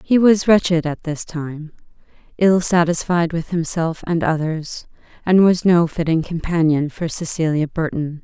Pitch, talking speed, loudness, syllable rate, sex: 165 Hz, 130 wpm, -18 LUFS, 4.4 syllables/s, female